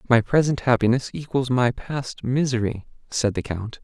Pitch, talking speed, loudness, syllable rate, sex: 125 Hz, 155 wpm, -23 LUFS, 4.7 syllables/s, male